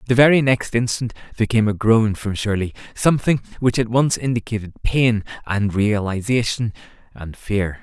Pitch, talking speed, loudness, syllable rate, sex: 110 Hz, 155 wpm, -19 LUFS, 5.1 syllables/s, male